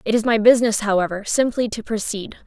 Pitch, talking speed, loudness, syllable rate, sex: 220 Hz, 195 wpm, -19 LUFS, 6.1 syllables/s, female